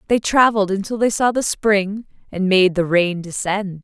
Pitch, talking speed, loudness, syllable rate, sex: 200 Hz, 190 wpm, -18 LUFS, 4.7 syllables/s, female